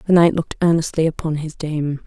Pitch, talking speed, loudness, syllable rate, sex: 160 Hz, 205 wpm, -19 LUFS, 6.0 syllables/s, female